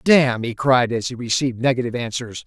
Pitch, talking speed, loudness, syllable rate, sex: 125 Hz, 195 wpm, -20 LUFS, 5.9 syllables/s, male